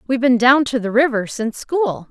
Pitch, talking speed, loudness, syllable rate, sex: 245 Hz, 230 wpm, -17 LUFS, 5.8 syllables/s, female